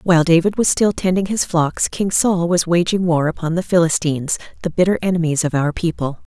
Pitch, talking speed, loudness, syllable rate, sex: 170 Hz, 200 wpm, -17 LUFS, 5.6 syllables/s, female